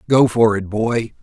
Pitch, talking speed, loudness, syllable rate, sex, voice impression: 110 Hz, 195 wpm, -17 LUFS, 4.1 syllables/s, male, very masculine, very adult-like, middle-aged, very thick, tensed, slightly powerful, slightly weak, slightly dark, slightly soft, muffled, fluent, slightly raspy, intellectual, slightly refreshing, sincere, slightly calm, mature, reassuring, slightly unique, elegant, slightly wild, sweet, lively